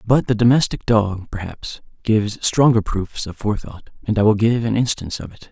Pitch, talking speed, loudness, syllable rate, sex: 110 Hz, 195 wpm, -19 LUFS, 5.4 syllables/s, male